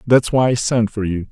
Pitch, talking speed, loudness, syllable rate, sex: 115 Hz, 275 wpm, -17 LUFS, 5.2 syllables/s, male